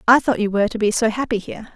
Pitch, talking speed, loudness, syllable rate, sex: 220 Hz, 305 wpm, -19 LUFS, 7.6 syllables/s, female